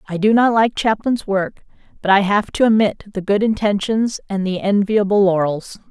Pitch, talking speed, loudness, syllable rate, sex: 205 Hz, 185 wpm, -17 LUFS, 4.9 syllables/s, female